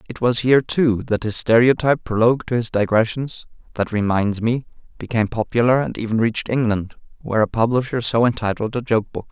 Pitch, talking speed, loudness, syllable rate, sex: 115 Hz, 170 wpm, -19 LUFS, 6.0 syllables/s, male